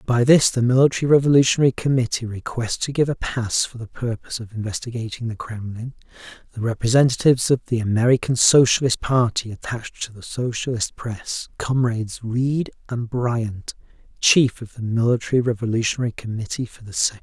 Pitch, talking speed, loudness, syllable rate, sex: 120 Hz, 150 wpm, -21 LUFS, 5.8 syllables/s, male